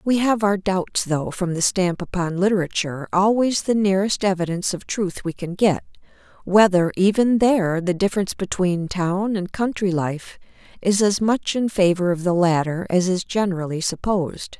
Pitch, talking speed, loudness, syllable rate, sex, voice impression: 190 Hz, 170 wpm, -21 LUFS, 5.0 syllables/s, female, feminine, very adult-like, slightly fluent, sincere, slightly elegant, slightly sweet